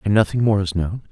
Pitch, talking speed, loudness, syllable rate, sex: 100 Hz, 270 wpm, -19 LUFS, 5.9 syllables/s, male